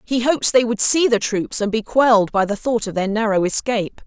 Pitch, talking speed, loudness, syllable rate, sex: 220 Hz, 250 wpm, -18 LUFS, 5.5 syllables/s, female